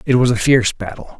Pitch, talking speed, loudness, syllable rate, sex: 120 Hz, 250 wpm, -15 LUFS, 6.5 syllables/s, male